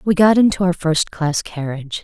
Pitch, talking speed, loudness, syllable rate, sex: 175 Hz, 175 wpm, -17 LUFS, 5.2 syllables/s, female